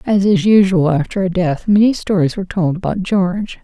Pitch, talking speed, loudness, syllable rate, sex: 195 Hz, 200 wpm, -15 LUFS, 5.4 syllables/s, female